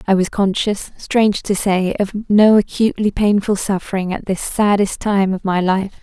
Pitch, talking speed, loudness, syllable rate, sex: 200 Hz, 180 wpm, -17 LUFS, 4.7 syllables/s, female